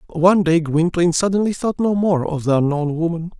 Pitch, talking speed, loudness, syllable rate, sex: 170 Hz, 195 wpm, -18 LUFS, 5.7 syllables/s, male